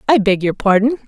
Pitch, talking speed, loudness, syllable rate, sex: 220 Hz, 225 wpm, -15 LUFS, 6.0 syllables/s, female